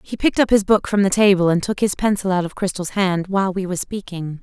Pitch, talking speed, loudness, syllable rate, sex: 190 Hz, 270 wpm, -19 LUFS, 6.2 syllables/s, female